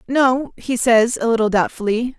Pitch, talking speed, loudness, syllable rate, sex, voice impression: 235 Hz, 165 wpm, -17 LUFS, 4.7 syllables/s, female, feminine, adult-like, slightly powerful, slightly intellectual, slightly strict